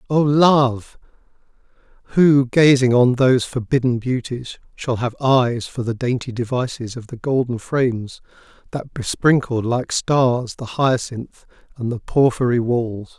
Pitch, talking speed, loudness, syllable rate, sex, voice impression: 125 Hz, 125 wpm, -19 LUFS, 4.1 syllables/s, male, masculine, adult-like, slightly middle-aged, slightly thick, tensed, slightly weak, slightly dark, slightly soft, slightly muffled, slightly fluent, slightly cool, intellectual, slightly refreshing, slightly sincere, calm, slightly mature, slightly reassuring, slightly wild, lively, slightly strict, slightly intense, modest